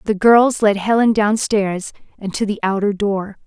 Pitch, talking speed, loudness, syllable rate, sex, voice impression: 205 Hz, 175 wpm, -17 LUFS, 4.3 syllables/s, female, feminine, slightly adult-like, slightly fluent, slightly intellectual, slightly strict